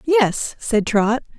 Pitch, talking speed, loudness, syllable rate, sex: 225 Hz, 130 wpm, -19 LUFS, 2.7 syllables/s, female